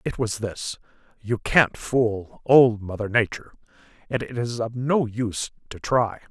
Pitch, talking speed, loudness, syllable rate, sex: 115 Hz, 160 wpm, -23 LUFS, 4.2 syllables/s, male